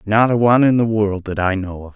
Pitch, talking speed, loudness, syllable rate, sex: 105 Hz, 305 wpm, -16 LUFS, 6.0 syllables/s, male